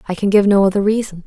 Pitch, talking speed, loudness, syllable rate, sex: 200 Hz, 285 wpm, -15 LUFS, 7.3 syllables/s, female